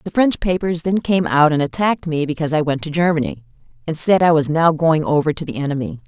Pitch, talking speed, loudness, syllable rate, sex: 160 Hz, 235 wpm, -17 LUFS, 6.2 syllables/s, female